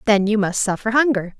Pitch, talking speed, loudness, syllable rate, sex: 210 Hz, 215 wpm, -18 LUFS, 5.7 syllables/s, female